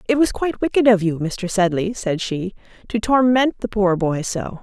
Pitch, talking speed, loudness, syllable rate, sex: 210 Hz, 210 wpm, -19 LUFS, 4.9 syllables/s, female